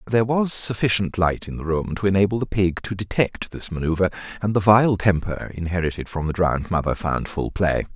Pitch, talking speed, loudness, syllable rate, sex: 95 Hz, 205 wpm, -22 LUFS, 5.6 syllables/s, male